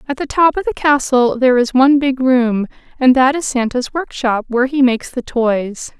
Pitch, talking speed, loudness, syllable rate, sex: 260 Hz, 220 wpm, -15 LUFS, 5.2 syllables/s, female